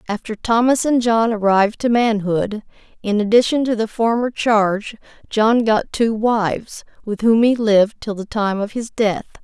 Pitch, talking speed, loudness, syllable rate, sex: 220 Hz, 170 wpm, -18 LUFS, 4.7 syllables/s, female